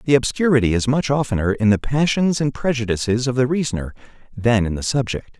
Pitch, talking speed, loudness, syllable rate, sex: 125 Hz, 190 wpm, -19 LUFS, 6.0 syllables/s, male